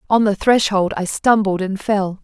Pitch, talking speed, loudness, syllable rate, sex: 200 Hz, 190 wpm, -17 LUFS, 4.5 syllables/s, female